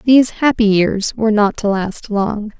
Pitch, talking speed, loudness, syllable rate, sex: 215 Hz, 185 wpm, -15 LUFS, 4.4 syllables/s, female